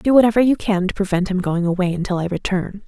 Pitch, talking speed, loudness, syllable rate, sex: 195 Hz, 250 wpm, -19 LUFS, 6.4 syllables/s, female